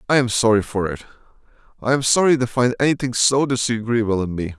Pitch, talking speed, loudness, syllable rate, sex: 120 Hz, 195 wpm, -19 LUFS, 6.1 syllables/s, male